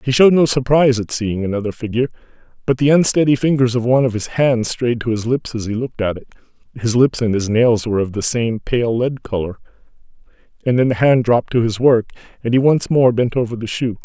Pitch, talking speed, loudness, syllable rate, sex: 120 Hz, 230 wpm, -17 LUFS, 5.2 syllables/s, male